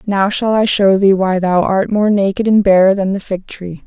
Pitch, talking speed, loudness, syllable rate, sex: 195 Hz, 250 wpm, -13 LUFS, 5.0 syllables/s, female